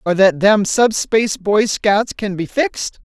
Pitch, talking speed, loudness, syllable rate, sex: 210 Hz, 175 wpm, -16 LUFS, 4.1 syllables/s, female